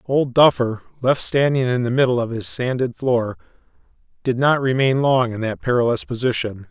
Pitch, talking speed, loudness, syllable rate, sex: 125 Hz, 170 wpm, -19 LUFS, 5.1 syllables/s, male